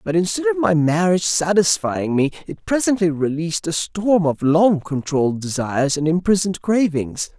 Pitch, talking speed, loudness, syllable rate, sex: 170 Hz, 155 wpm, -19 LUFS, 5.2 syllables/s, male